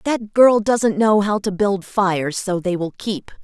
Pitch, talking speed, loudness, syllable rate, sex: 200 Hz, 210 wpm, -18 LUFS, 4.0 syllables/s, female